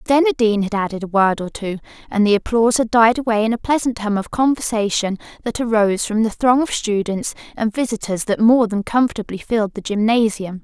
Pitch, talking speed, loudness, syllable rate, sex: 220 Hz, 210 wpm, -18 LUFS, 5.8 syllables/s, female